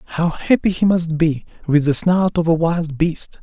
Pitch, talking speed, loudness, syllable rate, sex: 165 Hz, 210 wpm, -17 LUFS, 4.6 syllables/s, male